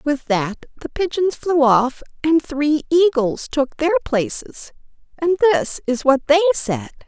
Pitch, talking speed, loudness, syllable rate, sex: 290 Hz, 155 wpm, -18 LUFS, 3.9 syllables/s, female